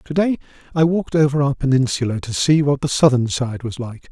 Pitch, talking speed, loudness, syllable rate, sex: 135 Hz, 220 wpm, -18 LUFS, 5.9 syllables/s, male